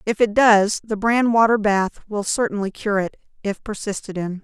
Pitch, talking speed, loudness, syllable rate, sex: 210 Hz, 190 wpm, -20 LUFS, 4.8 syllables/s, female